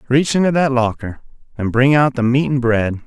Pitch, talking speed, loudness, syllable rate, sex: 130 Hz, 215 wpm, -16 LUFS, 5.3 syllables/s, male